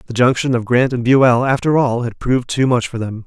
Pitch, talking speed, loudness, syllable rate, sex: 125 Hz, 255 wpm, -16 LUFS, 5.5 syllables/s, male